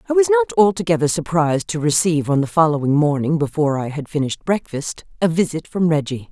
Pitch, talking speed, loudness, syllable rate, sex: 165 Hz, 190 wpm, -18 LUFS, 6.3 syllables/s, female